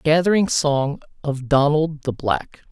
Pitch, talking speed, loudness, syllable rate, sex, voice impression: 145 Hz, 130 wpm, -20 LUFS, 3.9 syllables/s, male, masculine, adult-like, tensed, clear, fluent, intellectual, friendly, unique, kind, slightly modest